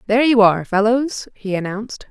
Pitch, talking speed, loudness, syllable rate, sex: 220 Hz, 170 wpm, -17 LUFS, 6.0 syllables/s, female